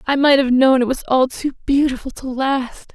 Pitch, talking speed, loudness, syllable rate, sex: 265 Hz, 225 wpm, -17 LUFS, 4.9 syllables/s, female